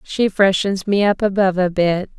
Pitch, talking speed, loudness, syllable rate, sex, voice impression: 195 Hz, 190 wpm, -17 LUFS, 4.9 syllables/s, female, feminine, very adult-like, intellectual, slightly calm